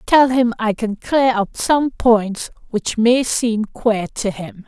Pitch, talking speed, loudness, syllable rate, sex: 225 Hz, 180 wpm, -17 LUFS, 3.3 syllables/s, female